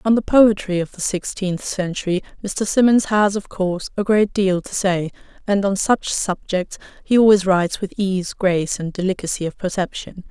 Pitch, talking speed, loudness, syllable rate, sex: 195 Hz, 180 wpm, -19 LUFS, 5.0 syllables/s, female